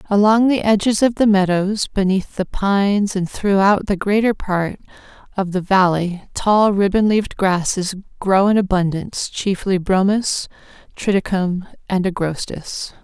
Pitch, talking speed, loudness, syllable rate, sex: 195 Hz, 135 wpm, -18 LUFS, 4.4 syllables/s, female